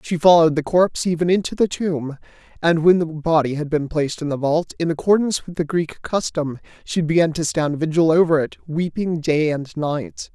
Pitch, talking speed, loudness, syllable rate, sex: 160 Hz, 205 wpm, -20 LUFS, 5.3 syllables/s, male